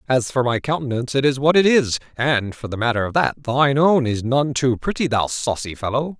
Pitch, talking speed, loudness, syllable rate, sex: 130 Hz, 230 wpm, -19 LUFS, 5.5 syllables/s, male